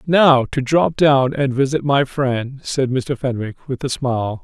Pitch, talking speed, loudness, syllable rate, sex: 135 Hz, 190 wpm, -18 LUFS, 4.1 syllables/s, male